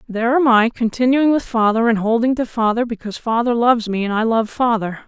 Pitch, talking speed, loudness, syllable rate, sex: 230 Hz, 215 wpm, -17 LUFS, 5.9 syllables/s, female